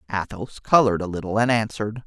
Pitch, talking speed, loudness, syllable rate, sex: 105 Hz, 175 wpm, -22 LUFS, 6.8 syllables/s, male